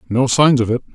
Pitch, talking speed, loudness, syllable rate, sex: 120 Hz, 255 wpm, -15 LUFS, 6.4 syllables/s, male